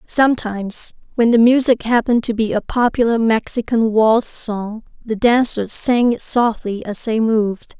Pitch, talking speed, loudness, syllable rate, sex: 225 Hz, 155 wpm, -17 LUFS, 4.5 syllables/s, female